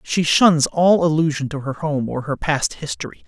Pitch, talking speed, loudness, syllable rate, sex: 155 Hz, 200 wpm, -19 LUFS, 4.8 syllables/s, male